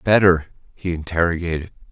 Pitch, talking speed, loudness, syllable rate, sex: 85 Hz, 95 wpm, -20 LUFS, 5.3 syllables/s, male